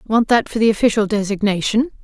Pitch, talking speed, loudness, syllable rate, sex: 215 Hz, 175 wpm, -17 LUFS, 6.1 syllables/s, female